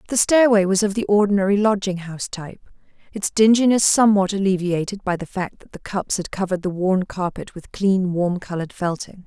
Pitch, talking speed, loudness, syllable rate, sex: 195 Hz, 190 wpm, -20 LUFS, 5.7 syllables/s, female